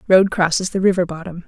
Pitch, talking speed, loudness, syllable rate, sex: 180 Hz, 205 wpm, -17 LUFS, 6.1 syllables/s, female